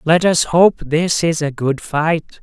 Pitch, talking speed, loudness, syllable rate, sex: 160 Hz, 200 wpm, -16 LUFS, 3.6 syllables/s, male